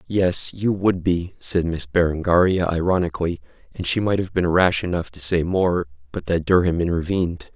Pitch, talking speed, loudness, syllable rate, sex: 90 Hz, 175 wpm, -21 LUFS, 5.1 syllables/s, male